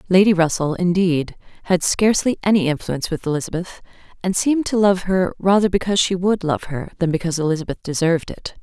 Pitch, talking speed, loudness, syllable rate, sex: 180 Hz, 175 wpm, -19 LUFS, 6.3 syllables/s, female